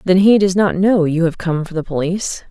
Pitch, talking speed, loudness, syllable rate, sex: 180 Hz, 265 wpm, -16 LUFS, 5.6 syllables/s, female